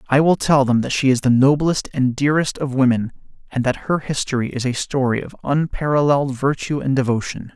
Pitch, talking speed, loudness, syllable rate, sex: 135 Hz, 200 wpm, -19 LUFS, 5.6 syllables/s, male